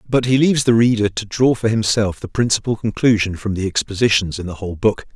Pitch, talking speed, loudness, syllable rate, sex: 110 Hz, 220 wpm, -17 LUFS, 6.1 syllables/s, male